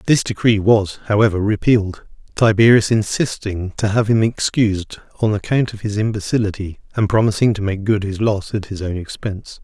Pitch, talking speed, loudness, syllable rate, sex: 105 Hz, 170 wpm, -18 LUFS, 5.4 syllables/s, male